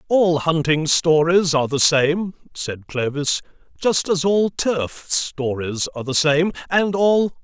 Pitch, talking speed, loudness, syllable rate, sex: 160 Hz, 145 wpm, -19 LUFS, 3.8 syllables/s, male